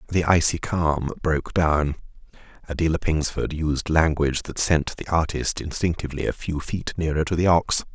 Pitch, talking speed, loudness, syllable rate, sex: 80 Hz, 160 wpm, -23 LUFS, 5.1 syllables/s, male